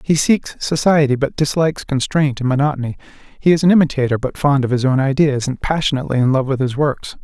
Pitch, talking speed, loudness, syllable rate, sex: 140 Hz, 205 wpm, -17 LUFS, 6.2 syllables/s, male